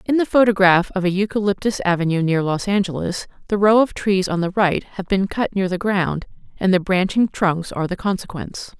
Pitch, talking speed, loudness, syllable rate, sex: 190 Hz, 205 wpm, -19 LUFS, 5.4 syllables/s, female